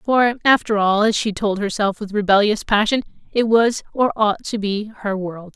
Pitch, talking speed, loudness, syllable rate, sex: 210 Hz, 195 wpm, -19 LUFS, 4.7 syllables/s, female